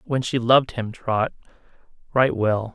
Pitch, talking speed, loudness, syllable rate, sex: 120 Hz, 155 wpm, -22 LUFS, 4.4 syllables/s, male